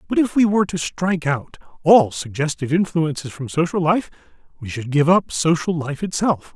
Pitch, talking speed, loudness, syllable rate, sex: 160 Hz, 185 wpm, -19 LUFS, 5.4 syllables/s, male